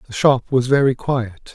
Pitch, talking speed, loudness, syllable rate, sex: 130 Hz, 195 wpm, -18 LUFS, 4.5 syllables/s, male